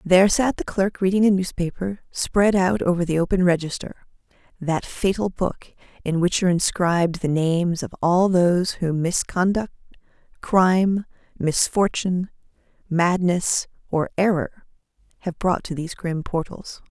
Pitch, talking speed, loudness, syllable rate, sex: 180 Hz, 130 wpm, -21 LUFS, 4.6 syllables/s, female